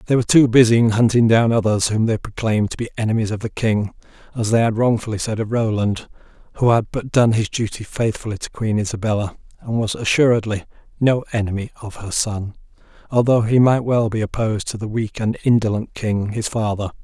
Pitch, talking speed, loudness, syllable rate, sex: 110 Hz, 195 wpm, -19 LUFS, 5.8 syllables/s, male